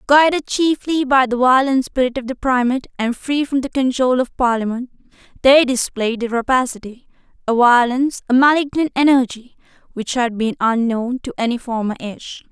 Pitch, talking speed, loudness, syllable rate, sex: 255 Hz, 160 wpm, -17 LUFS, 5.3 syllables/s, female